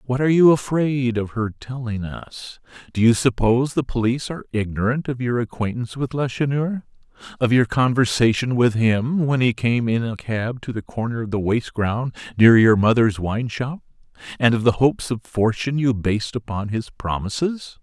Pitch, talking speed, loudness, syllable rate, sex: 120 Hz, 180 wpm, -20 LUFS, 5.1 syllables/s, male